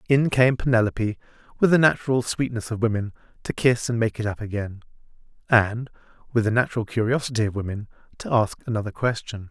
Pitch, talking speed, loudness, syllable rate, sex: 115 Hz, 145 wpm, -23 LUFS, 6.1 syllables/s, male